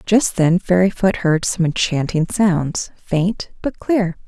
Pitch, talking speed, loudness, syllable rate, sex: 180 Hz, 140 wpm, -18 LUFS, 3.6 syllables/s, female